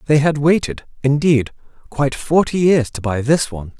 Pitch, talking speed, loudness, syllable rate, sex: 140 Hz, 175 wpm, -17 LUFS, 5.2 syllables/s, male